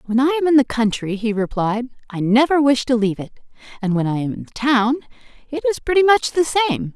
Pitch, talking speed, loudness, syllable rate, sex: 250 Hz, 225 wpm, -18 LUFS, 5.7 syllables/s, female